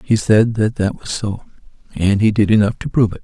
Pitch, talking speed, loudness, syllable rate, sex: 105 Hz, 240 wpm, -16 LUFS, 5.7 syllables/s, male